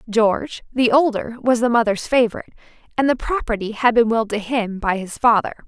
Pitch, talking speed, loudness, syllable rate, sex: 230 Hz, 190 wpm, -19 LUFS, 5.7 syllables/s, female